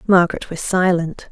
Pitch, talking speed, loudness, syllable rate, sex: 180 Hz, 135 wpm, -18 LUFS, 5.1 syllables/s, female